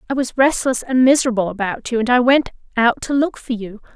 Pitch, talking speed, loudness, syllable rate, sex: 245 Hz, 225 wpm, -17 LUFS, 5.8 syllables/s, female